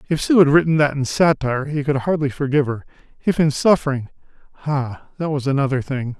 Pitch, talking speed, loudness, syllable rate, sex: 145 Hz, 185 wpm, -19 LUFS, 6.0 syllables/s, male